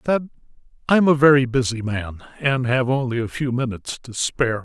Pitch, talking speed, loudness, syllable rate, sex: 130 Hz, 205 wpm, -20 LUFS, 6.0 syllables/s, male